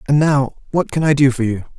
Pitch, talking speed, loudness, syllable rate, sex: 135 Hz, 270 wpm, -17 LUFS, 6.0 syllables/s, male